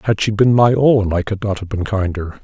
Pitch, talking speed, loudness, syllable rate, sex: 105 Hz, 270 wpm, -16 LUFS, 5.3 syllables/s, male